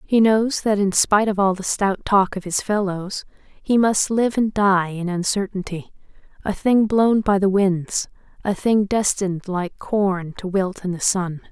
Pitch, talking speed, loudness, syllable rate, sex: 195 Hz, 190 wpm, -20 LUFS, 4.2 syllables/s, female